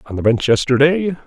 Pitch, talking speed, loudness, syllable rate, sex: 140 Hz, 190 wpm, -15 LUFS, 5.6 syllables/s, male